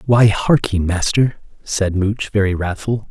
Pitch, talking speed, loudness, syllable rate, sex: 100 Hz, 135 wpm, -17 LUFS, 4.1 syllables/s, male